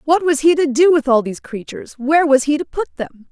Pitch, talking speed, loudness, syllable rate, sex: 290 Hz, 270 wpm, -16 LUFS, 6.3 syllables/s, female